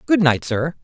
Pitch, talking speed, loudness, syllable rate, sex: 155 Hz, 215 wpm, -18 LUFS, 4.6 syllables/s, male